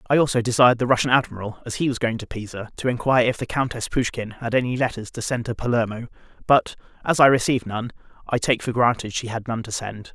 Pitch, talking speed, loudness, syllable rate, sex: 120 Hz, 230 wpm, -22 LUFS, 6.5 syllables/s, male